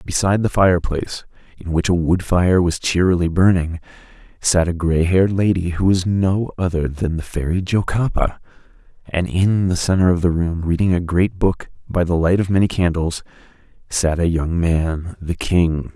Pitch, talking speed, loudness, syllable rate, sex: 90 Hz, 175 wpm, -18 LUFS, 4.9 syllables/s, male